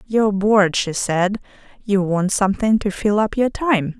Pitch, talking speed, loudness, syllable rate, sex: 200 Hz, 180 wpm, -18 LUFS, 4.7 syllables/s, female